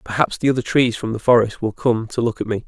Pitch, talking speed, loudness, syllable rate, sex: 115 Hz, 290 wpm, -19 LUFS, 6.2 syllables/s, male